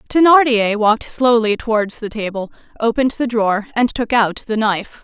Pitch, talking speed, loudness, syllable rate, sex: 225 Hz, 165 wpm, -16 LUFS, 5.4 syllables/s, female